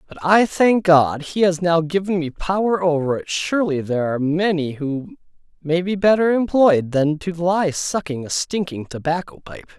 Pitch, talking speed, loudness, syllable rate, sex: 170 Hz, 180 wpm, -19 LUFS, 4.8 syllables/s, male